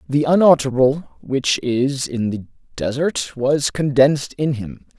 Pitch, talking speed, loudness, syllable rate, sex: 135 Hz, 130 wpm, -18 LUFS, 4.2 syllables/s, male